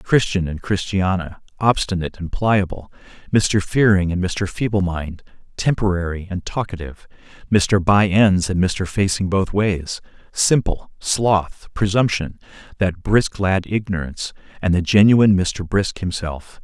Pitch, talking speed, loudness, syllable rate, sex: 95 Hz, 125 wpm, -19 LUFS, 4.3 syllables/s, male